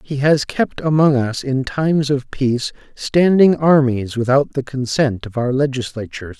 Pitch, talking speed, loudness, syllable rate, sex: 135 Hz, 160 wpm, -17 LUFS, 4.6 syllables/s, male